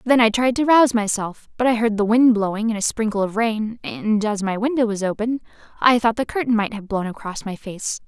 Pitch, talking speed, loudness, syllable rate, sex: 220 Hz, 245 wpm, -20 LUFS, 5.7 syllables/s, female